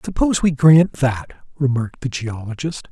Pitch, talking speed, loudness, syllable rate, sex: 140 Hz, 145 wpm, -18 LUFS, 5.0 syllables/s, male